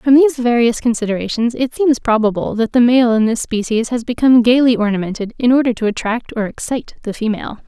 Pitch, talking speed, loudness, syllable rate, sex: 235 Hz, 195 wpm, -15 LUFS, 6.2 syllables/s, female